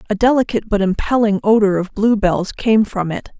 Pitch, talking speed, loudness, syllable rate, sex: 210 Hz, 175 wpm, -16 LUFS, 5.5 syllables/s, female